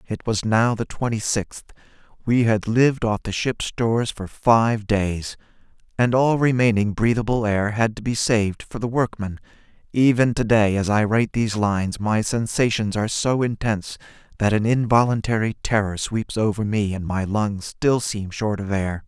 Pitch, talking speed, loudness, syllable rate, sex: 110 Hz, 175 wpm, -21 LUFS, 4.8 syllables/s, male